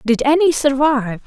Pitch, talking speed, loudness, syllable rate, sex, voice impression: 275 Hz, 145 wpm, -15 LUFS, 5.4 syllables/s, female, very feminine, slightly adult-like, thin, tensed, powerful, bright, soft, very clear, very fluent, very cute, very intellectual, refreshing, sincere, very calm, very friendly, very reassuring, unique, very elegant, slightly wild, very sweet, lively, kind, modest